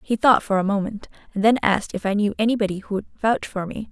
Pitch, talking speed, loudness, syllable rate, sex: 210 Hz, 260 wpm, -21 LUFS, 6.5 syllables/s, female